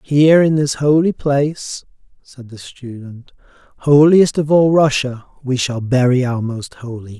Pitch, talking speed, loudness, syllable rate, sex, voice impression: 135 Hz, 150 wpm, -14 LUFS, 4.3 syllables/s, male, masculine, middle-aged, powerful, raspy, slightly mature, friendly, unique, wild, lively, intense